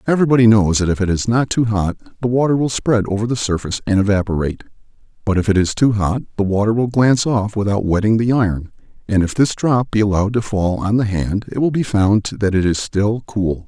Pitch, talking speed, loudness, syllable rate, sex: 105 Hz, 235 wpm, -17 LUFS, 6.1 syllables/s, male